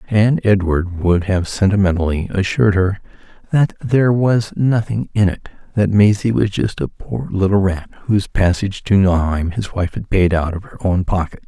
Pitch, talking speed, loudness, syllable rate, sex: 100 Hz, 180 wpm, -17 LUFS, 4.9 syllables/s, male